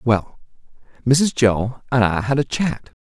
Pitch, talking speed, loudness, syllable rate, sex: 125 Hz, 160 wpm, -19 LUFS, 3.8 syllables/s, male